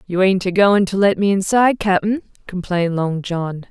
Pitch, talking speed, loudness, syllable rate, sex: 190 Hz, 195 wpm, -17 LUFS, 4.8 syllables/s, female